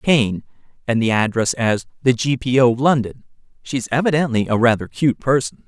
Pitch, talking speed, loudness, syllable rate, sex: 125 Hz, 170 wpm, -18 LUFS, 5.3 syllables/s, male